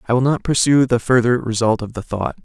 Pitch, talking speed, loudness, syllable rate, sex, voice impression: 120 Hz, 245 wpm, -17 LUFS, 5.9 syllables/s, male, masculine, adult-like, slightly soft, slightly fluent, slightly refreshing, sincere, kind